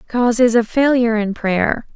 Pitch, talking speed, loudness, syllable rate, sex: 230 Hz, 155 wpm, -16 LUFS, 4.7 syllables/s, female